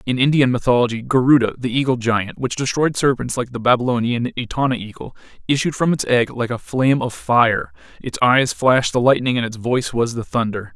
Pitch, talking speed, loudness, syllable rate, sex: 125 Hz, 195 wpm, -18 LUFS, 5.7 syllables/s, male